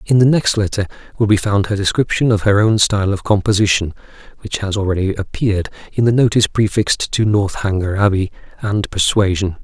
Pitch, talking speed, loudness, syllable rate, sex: 100 Hz, 175 wpm, -16 LUFS, 5.9 syllables/s, male